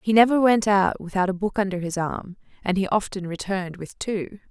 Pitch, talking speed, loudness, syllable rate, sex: 195 Hz, 215 wpm, -23 LUFS, 5.4 syllables/s, female